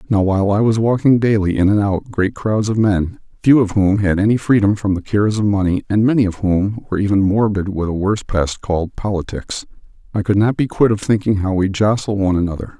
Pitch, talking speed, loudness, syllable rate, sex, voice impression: 100 Hz, 230 wpm, -17 LUFS, 3.0 syllables/s, male, masculine, middle-aged, tensed, slightly muffled, fluent, intellectual, sincere, calm, slightly mature, friendly, reassuring, wild, slightly lively, kind